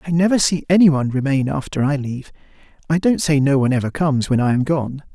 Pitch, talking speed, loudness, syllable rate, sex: 145 Hz, 235 wpm, -18 LUFS, 6.7 syllables/s, male